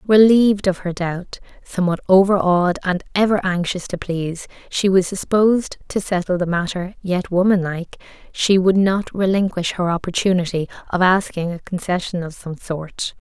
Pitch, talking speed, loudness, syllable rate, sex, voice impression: 185 Hz, 150 wpm, -19 LUFS, 5.1 syllables/s, female, feminine, adult-like, slightly fluent, slightly calm, slightly unique, slightly kind